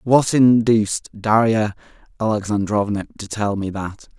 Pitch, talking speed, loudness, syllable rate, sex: 105 Hz, 115 wpm, -19 LUFS, 4.4 syllables/s, male